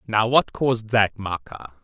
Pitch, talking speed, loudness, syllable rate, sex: 110 Hz, 165 wpm, -21 LUFS, 4.4 syllables/s, male